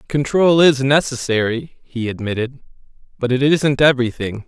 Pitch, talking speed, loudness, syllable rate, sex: 130 Hz, 120 wpm, -17 LUFS, 4.9 syllables/s, male